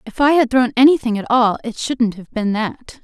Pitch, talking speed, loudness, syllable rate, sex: 240 Hz, 240 wpm, -17 LUFS, 5.1 syllables/s, female